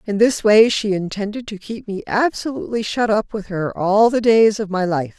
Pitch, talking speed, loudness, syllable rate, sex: 210 Hz, 220 wpm, -18 LUFS, 4.9 syllables/s, female